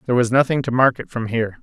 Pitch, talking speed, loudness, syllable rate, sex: 120 Hz, 295 wpm, -19 LUFS, 7.4 syllables/s, male